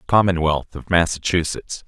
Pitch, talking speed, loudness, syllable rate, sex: 85 Hz, 95 wpm, -20 LUFS, 4.7 syllables/s, male